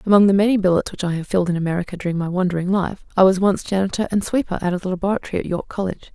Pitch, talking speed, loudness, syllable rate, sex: 185 Hz, 265 wpm, -20 LUFS, 8.1 syllables/s, female